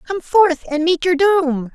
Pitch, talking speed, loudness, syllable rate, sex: 330 Hz, 205 wpm, -16 LUFS, 3.8 syllables/s, female